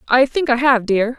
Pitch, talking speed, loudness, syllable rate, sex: 250 Hz, 255 wpm, -16 LUFS, 4.9 syllables/s, female